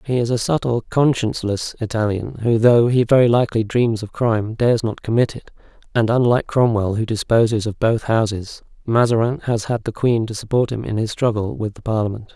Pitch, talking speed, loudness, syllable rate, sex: 115 Hz, 195 wpm, -19 LUFS, 5.6 syllables/s, male